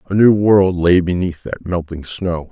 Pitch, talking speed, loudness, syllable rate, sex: 90 Hz, 190 wpm, -15 LUFS, 4.4 syllables/s, male